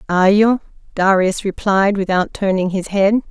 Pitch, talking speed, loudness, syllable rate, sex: 195 Hz, 145 wpm, -16 LUFS, 4.9 syllables/s, female